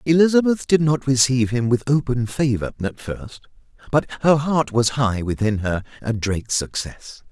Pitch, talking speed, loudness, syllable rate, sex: 125 Hz, 165 wpm, -20 LUFS, 4.8 syllables/s, male